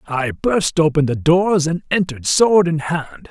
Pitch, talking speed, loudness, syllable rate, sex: 160 Hz, 180 wpm, -17 LUFS, 4.5 syllables/s, male